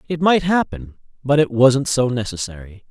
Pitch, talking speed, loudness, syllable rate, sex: 135 Hz, 165 wpm, -18 LUFS, 5.0 syllables/s, male